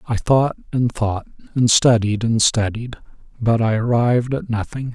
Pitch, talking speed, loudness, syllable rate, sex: 115 Hz, 160 wpm, -18 LUFS, 4.5 syllables/s, male